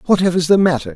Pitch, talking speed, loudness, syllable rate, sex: 165 Hz, 190 wpm, -15 LUFS, 6.6 syllables/s, male